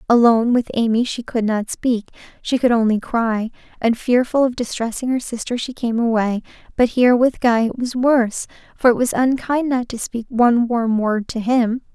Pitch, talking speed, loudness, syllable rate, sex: 235 Hz, 195 wpm, -18 LUFS, 5.0 syllables/s, female